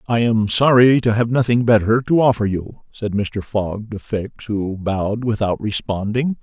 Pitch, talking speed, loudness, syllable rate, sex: 110 Hz, 175 wpm, -18 LUFS, 4.4 syllables/s, male